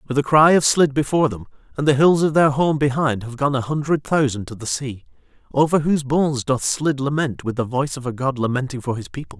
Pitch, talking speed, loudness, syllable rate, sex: 135 Hz, 245 wpm, -19 LUFS, 6.1 syllables/s, male